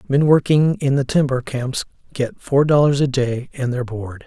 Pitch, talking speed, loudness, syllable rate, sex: 135 Hz, 195 wpm, -18 LUFS, 4.5 syllables/s, male